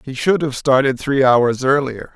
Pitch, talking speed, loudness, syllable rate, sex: 135 Hz, 195 wpm, -16 LUFS, 4.5 syllables/s, male